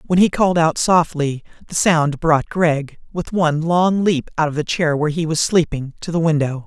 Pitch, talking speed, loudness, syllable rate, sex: 160 Hz, 215 wpm, -18 LUFS, 5.0 syllables/s, male